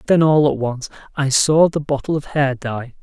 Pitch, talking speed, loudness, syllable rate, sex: 140 Hz, 220 wpm, -17 LUFS, 4.7 syllables/s, male